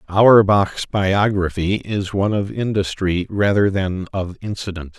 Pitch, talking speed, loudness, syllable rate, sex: 100 Hz, 120 wpm, -18 LUFS, 4.3 syllables/s, male